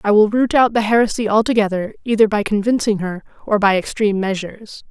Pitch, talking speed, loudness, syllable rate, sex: 210 Hz, 185 wpm, -17 LUFS, 6.1 syllables/s, female